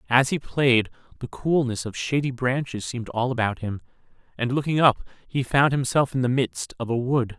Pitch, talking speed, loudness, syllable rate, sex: 125 Hz, 195 wpm, -24 LUFS, 5.2 syllables/s, male